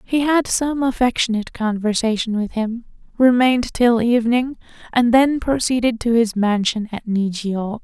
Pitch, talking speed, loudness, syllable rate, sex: 235 Hz, 140 wpm, -18 LUFS, 4.7 syllables/s, female